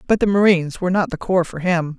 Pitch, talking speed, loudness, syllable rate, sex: 180 Hz, 270 wpm, -18 LUFS, 6.6 syllables/s, female